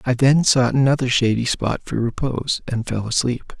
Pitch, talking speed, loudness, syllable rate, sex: 125 Hz, 185 wpm, -19 LUFS, 5.0 syllables/s, male